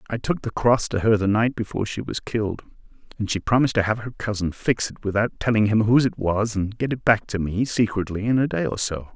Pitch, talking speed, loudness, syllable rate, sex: 110 Hz, 255 wpm, -22 LUFS, 6.0 syllables/s, male